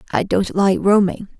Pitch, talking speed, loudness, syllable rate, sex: 195 Hz, 170 wpm, -17 LUFS, 4.6 syllables/s, female